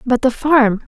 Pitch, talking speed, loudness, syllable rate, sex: 255 Hz, 190 wpm, -15 LUFS, 3.9 syllables/s, female